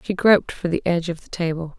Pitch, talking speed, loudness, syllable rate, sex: 175 Hz, 270 wpm, -21 LUFS, 6.6 syllables/s, female